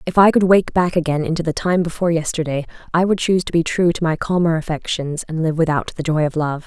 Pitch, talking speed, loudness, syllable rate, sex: 165 Hz, 250 wpm, -18 LUFS, 6.3 syllables/s, female